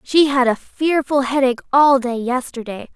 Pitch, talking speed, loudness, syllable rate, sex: 265 Hz, 160 wpm, -17 LUFS, 4.8 syllables/s, female